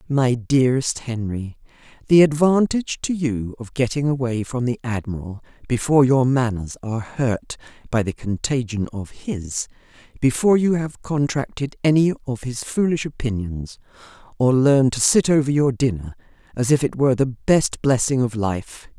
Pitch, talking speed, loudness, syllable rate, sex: 130 Hz, 150 wpm, -20 LUFS, 4.9 syllables/s, female